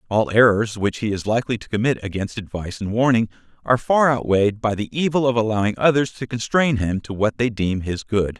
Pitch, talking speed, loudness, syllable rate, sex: 110 Hz, 215 wpm, -20 LUFS, 5.9 syllables/s, male